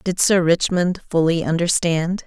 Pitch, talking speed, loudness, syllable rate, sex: 170 Hz, 130 wpm, -18 LUFS, 4.2 syllables/s, female